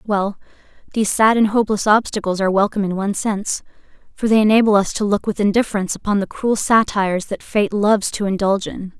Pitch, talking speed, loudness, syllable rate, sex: 205 Hz, 195 wpm, -18 LUFS, 6.5 syllables/s, female